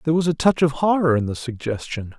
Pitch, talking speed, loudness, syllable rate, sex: 145 Hz, 245 wpm, -21 LUFS, 6.3 syllables/s, male